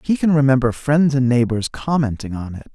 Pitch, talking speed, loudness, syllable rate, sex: 130 Hz, 195 wpm, -18 LUFS, 5.4 syllables/s, male